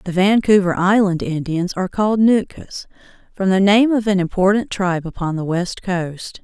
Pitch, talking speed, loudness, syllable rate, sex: 190 Hz, 170 wpm, -17 LUFS, 5.0 syllables/s, female